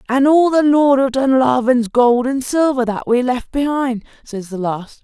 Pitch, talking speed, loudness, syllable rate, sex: 255 Hz, 190 wpm, -15 LUFS, 4.3 syllables/s, female